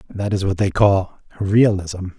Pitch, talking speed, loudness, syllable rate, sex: 100 Hz, 165 wpm, -18 LUFS, 4.1 syllables/s, male